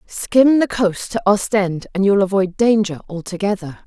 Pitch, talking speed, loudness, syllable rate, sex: 200 Hz, 155 wpm, -17 LUFS, 4.5 syllables/s, female